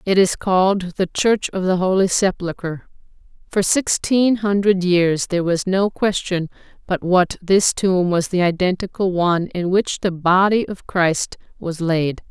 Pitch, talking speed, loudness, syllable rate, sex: 185 Hz, 160 wpm, -18 LUFS, 4.2 syllables/s, female